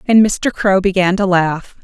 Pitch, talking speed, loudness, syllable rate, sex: 190 Hz, 195 wpm, -14 LUFS, 4.2 syllables/s, female